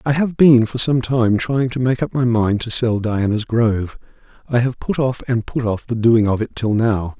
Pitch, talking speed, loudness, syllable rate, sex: 120 Hz, 240 wpm, -17 LUFS, 4.8 syllables/s, male